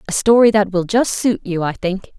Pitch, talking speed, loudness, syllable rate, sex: 200 Hz, 245 wpm, -16 LUFS, 5.1 syllables/s, female